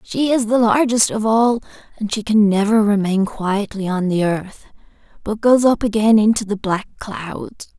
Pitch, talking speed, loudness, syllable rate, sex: 215 Hz, 175 wpm, -17 LUFS, 4.4 syllables/s, female